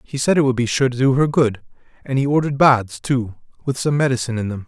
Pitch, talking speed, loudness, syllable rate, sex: 130 Hz, 255 wpm, -18 LUFS, 6.5 syllables/s, male